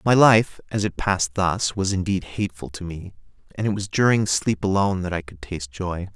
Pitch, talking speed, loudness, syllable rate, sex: 95 Hz, 215 wpm, -22 LUFS, 5.5 syllables/s, male